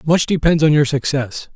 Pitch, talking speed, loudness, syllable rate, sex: 145 Hz, 195 wpm, -16 LUFS, 5.0 syllables/s, male